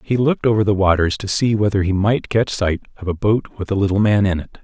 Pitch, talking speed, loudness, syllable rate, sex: 100 Hz, 270 wpm, -18 LUFS, 6.0 syllables/s, male